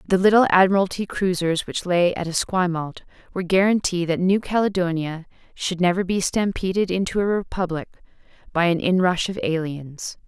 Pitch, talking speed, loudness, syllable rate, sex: 180 Hz, 145 wpm, -21 LUFS, 5.5 syllables/s, female